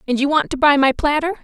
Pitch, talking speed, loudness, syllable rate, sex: 285 Hz, 295 wpm, -16 LUFS, 6.6 syllables/s, female